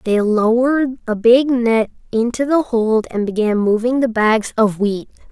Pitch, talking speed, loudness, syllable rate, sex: 230 Hz, 170 wpm, -16 LUFS, 4.3 syllables/s, female